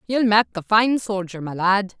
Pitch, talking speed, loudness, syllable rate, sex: 205 Hz, 210 wpm, -20 LUFS, 4.5 syllables/s, female